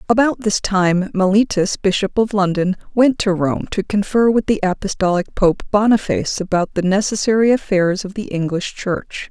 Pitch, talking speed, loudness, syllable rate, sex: 200 Hz, 160 wpm, -17 LUFS, 4.9 syllables/s, female